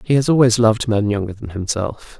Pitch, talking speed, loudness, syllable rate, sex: 110 Hz, 220 wpm, -17 LUFS, 5.7 syllables/s, male